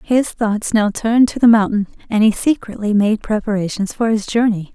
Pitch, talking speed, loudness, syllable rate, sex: 215 Hz, 190 wpm, -16 LUFS, 5.2 syllables/s, female